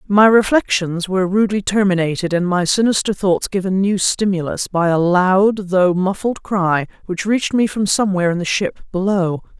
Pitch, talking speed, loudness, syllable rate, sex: 190 Hz, 170 wpm, -17 LUFS, 5.1 syllables/s, female